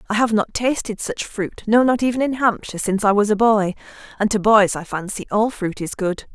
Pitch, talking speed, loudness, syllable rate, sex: 210 Hz, 215 wpm, -19 LUFS, 5.5 syllables/s, female